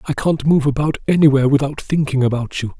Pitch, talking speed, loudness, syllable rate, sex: 140 Hz, 195 wpm, -17 LUFS, 6.2 syllables/s, male